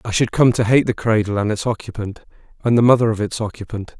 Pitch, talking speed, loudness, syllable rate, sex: 110 Hz, 240 wpm, -18 LUFS, 6.3 syllables/s, male